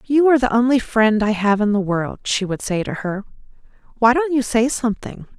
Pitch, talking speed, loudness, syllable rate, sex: 230 Hz, 225 wpm, -18 LUFS, 5.5 syllables/s, female